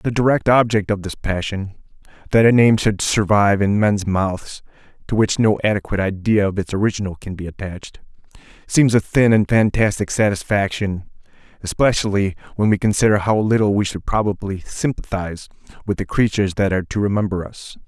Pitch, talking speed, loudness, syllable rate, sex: 100 Hz, 160 wpm, -18 LUFS, 5.6 syllables/s, male